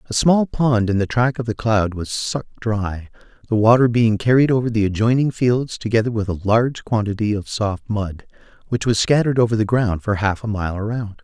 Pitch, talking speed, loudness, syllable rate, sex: 110 Hz, 210 wpm, -19 LUFS, 5.3 syllables/s, male